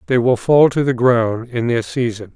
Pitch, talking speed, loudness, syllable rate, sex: 120 Hz, 230 wpm, -16 LUFS, 4.6 syllables/s, male